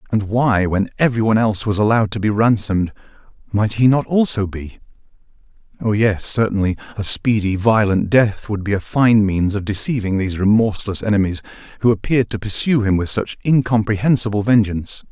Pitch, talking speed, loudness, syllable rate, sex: 105 Hz, 165 wpm, -17 LUFS, 5.9 syllables/s, male